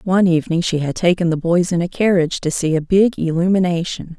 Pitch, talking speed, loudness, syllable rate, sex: 175 Hz, 215 wpm, -17 LUFS, 6.1 syllables/s, female